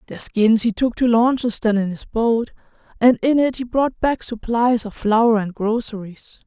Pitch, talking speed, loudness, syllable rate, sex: 230 Hz, 185 wpm, -19 LUFS, 4.4 syllables/s, female